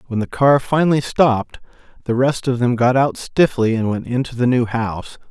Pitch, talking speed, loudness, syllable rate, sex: 125 Hz, 205 wpm, -17 LUFS, 5.3 syllables/s, male